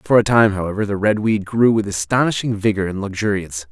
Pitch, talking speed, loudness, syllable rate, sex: 105 Hz, 210 wpm, -18 LUFS, 6.1 syllables/s, male